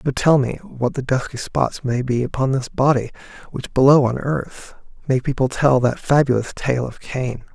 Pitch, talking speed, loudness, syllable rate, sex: 130 Hz, 190 wpm, -19 LUFS, 4.6 syllables/s, male